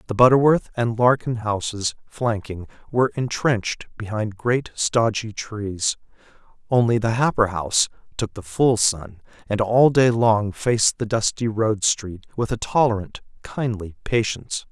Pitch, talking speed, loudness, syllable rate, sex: 110 Hz, 140 wpm, -21 LUFS, 4.4 syllables/s, male